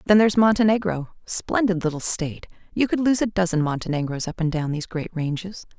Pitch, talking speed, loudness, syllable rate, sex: 180 Hz, 165 wpm, -22 LUFS, 6.0 syllables/s, female